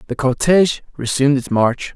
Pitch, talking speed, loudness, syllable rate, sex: 135 Hz, 155 wpm, -17 LUFS, 5.7 syllables/s, male